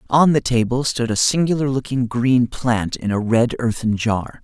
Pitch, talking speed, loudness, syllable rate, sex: 120 Hz, 190 wpm, -19 LUFS, 4.5 syllables/s, male